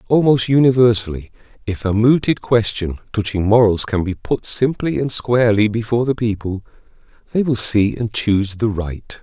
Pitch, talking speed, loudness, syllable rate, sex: 110 Hz, 155 wpm, -17 LUFS, 5.1 syllables/s, male